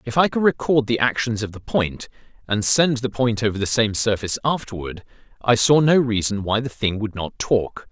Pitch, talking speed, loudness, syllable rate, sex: 115 Hz, 210 wpm, -20 LUFS, 5.1 syllables/s, male